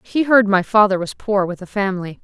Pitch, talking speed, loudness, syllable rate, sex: 200 Hz, 240 wpm, -17 LUFS, 5.6 syllables/s, female